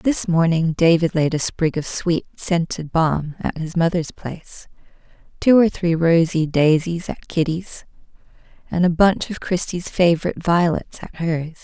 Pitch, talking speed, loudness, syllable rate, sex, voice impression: 165 Hz, 155 wpm, -19 LUFS, 4.4 syllables/s, female, feminine, very adult-like, slightly dark, calm, slightly sweet